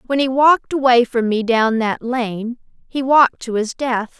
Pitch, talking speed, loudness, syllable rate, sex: 245 Hz, 200 wpm, -17 LUFS, 4.5 syllables/s, female